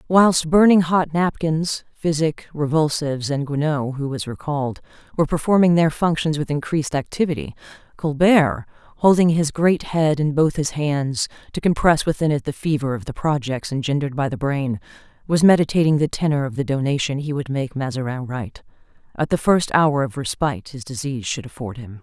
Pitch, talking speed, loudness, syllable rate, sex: 145 Hz, 170 wpm, -20 LUFS, 5.4 syllables/s, female